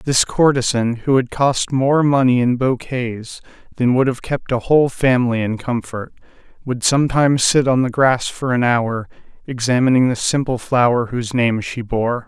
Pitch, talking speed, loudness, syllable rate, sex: 125 Hz, 170 wpm, -17 LUFS, 4.7 syllables/s, male